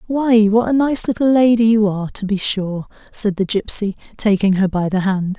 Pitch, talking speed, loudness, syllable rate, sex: 210 Hz, 210 wpm, -17 LUFS, 5.0 syllables/s, female